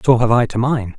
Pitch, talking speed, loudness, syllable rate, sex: 120 Hz, 305 wpm, -16 LUFS, 5.8 syllables/s, male